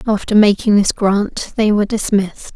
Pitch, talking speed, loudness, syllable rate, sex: 205 Hz, 165 wpm, -15 LUFS, 5.5 syllables/s, female